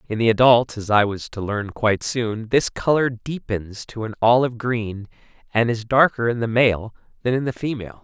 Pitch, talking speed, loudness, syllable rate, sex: 115 Hz, 200 wpm, -20 LUFS, 5.1 syllables/s, male